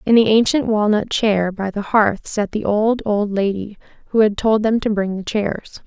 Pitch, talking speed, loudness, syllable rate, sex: 210 Hz, 215 wpm, -18 LUFS, 4.5 syllables/s, female